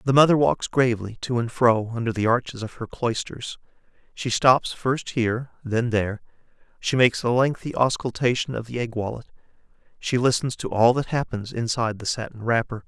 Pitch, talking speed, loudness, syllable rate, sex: 120 Hz, 175 wpm, -23 LUFS, 5.4 syllables/s, male